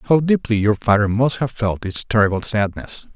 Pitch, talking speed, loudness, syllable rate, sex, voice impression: 110 Hz, 190 wpm, -18 LUFS, 4.9 syllables/s, male, masculine, very middle-aged, very thick, very tensed, very powerful, bright, very hard, soft, very clear, fluent, very cool, intellectual, slightly refreshing, sincere, very calm, very mature, very friendly, very reassuring, very unique, elegant, very wild, sweet, lively, kind, slightly modest